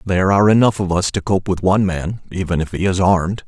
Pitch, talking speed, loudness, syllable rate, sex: 95 Hz, 260 wpm, -17 LUFS, 6.5 syllables/s, male